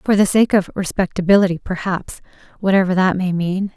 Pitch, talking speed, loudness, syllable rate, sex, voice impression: 190 Hz, 160 wpm, -17 LUFS, 5.6 syllables/s, female, very feminine, slightly young, slightly adult-like, thin, relaxed, weak, slightly bright, very soft, clear, very fluent, slightly raspy, very cute, intellectual, refreshing, very sincere, very calm, very friendly, very reassuring, very unique, very elegant, very sweet, very kind, very modest, light